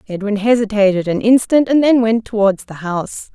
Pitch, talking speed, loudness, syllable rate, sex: 215 Hz, 180 wpm, -15 LUFS, 5.4 syllables/s, female